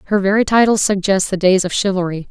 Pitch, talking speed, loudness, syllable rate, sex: 195 Hz, 210 wpm, -15 LUFS, 6.2 syllables/s, female